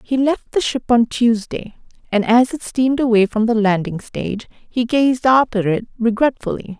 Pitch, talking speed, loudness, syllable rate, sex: 235 Hz, 175 wpm, -17 LUFS, 4.7 syllables/s, female